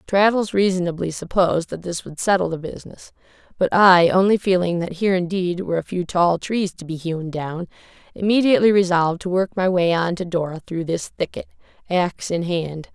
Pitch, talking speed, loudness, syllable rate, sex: 180 Hz, 185 wpm, -20 LUFS, 5.6 syllables/s, female